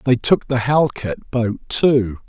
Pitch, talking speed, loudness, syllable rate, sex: 125 Hz, 160 wpm, -18 LUFS, 3.5 syllables/s, male